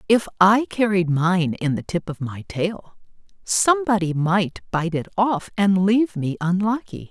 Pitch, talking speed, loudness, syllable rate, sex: 185 Hz, 160 wpm, -21 LUFS, 4.3 syllables/s, female